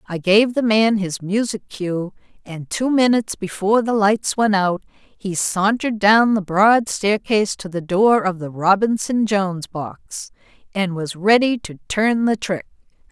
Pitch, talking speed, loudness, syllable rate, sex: 205 Hz, 165 wpm, -18 LUFS, 4.2 syllables/s, female